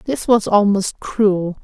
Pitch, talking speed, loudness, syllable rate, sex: 205 Hz, 145 wpm, -16 LUFS, 3.4 syllables/s, female